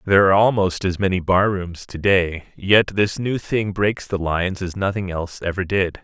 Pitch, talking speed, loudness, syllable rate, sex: 95 Hz, 210 wpm, -20 LUFS, 5.1 syllables/s, male